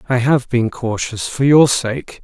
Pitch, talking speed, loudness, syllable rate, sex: 125 Hz, 160 wpm, -16 LUFS, 3.9 syllables/s, male